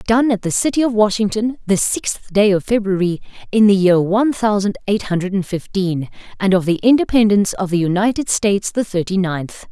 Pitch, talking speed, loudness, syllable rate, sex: 200 Hz, 190 wpm, -17 LUFS, 5.5 syllables/s, female